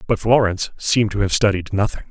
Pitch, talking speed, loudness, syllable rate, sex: 105 Hz, 200 wpm, -18 LUFS, 6.5 syllables/s, male